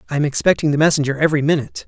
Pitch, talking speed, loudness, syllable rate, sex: 150 Hz, 225 wpm, -17 LUFS, 9.0 syllables/s, male